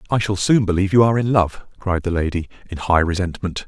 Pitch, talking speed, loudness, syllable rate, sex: 95 Hz, 230 wpm, -19 LUFS, 6.4 syllables/s, male